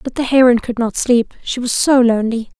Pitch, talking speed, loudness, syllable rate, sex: 240 Hz, 230 wpm, -15 LUFS, 5.4 syllables/s, female